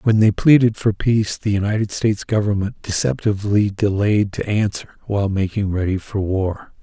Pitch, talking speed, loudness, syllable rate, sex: 105 Hz, 160 wpm, -19 LUFS, 5.2 syllables/s, male